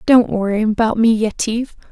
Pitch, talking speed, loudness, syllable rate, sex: 220 Hz, 155 wpm, -16 LUFS, 5.4 syllables/s, female